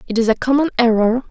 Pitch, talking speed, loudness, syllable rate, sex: 240 Hz, 230 wpm, -16 LUFS, 6.7 syllables/s, female